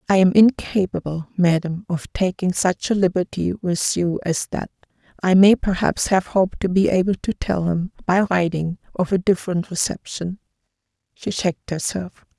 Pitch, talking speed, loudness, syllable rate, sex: 185 Hz, 160 wpm, -20 LUFS, 4.8 syllables/s, female